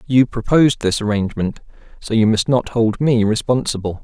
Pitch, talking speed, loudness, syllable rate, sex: 115 Hz, 165 wpm, -17 LUFS, 5.4 syllables/s, male